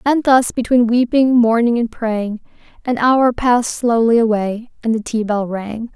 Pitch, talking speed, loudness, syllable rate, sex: 230 Hz, 170 wpm, -16 LUFS, 4.3 syllables/s, female